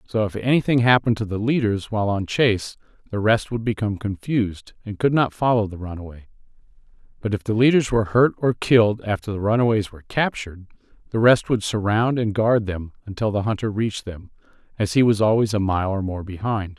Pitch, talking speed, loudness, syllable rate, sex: 105 Hz, 195 wpm, -21 LUFS, 6.0 syllables/s, male